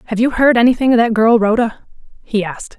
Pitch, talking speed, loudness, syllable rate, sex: 225 Hz, 215 wpm, -14 LUFS, 6.3 syllables/s, female